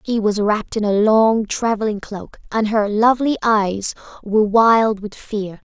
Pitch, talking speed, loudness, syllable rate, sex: 215 Hz, 170 wpm, -18 LUFS, 4.3 syllables/s, female